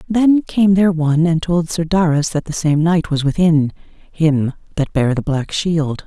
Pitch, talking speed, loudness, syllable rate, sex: 165 Hz, 200 wpm, -16 LUFS, 4.4 syllables/s, female